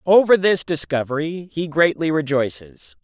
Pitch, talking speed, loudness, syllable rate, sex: 155 Hz, 120 wpm, -19 LUFS, 4.6 syllables/s, male